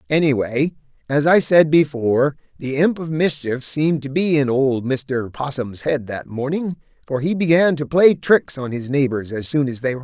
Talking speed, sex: 215 wpm, male